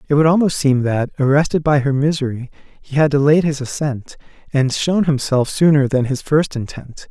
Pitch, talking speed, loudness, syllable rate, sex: 140 Hz, 185 wpm, -17 LUFS, 5.1 syllables/s, male